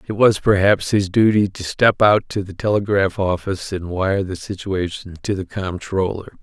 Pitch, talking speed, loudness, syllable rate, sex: 95 Hz, 175 wpm, -19 LUFS, 4.7 syllables/s, male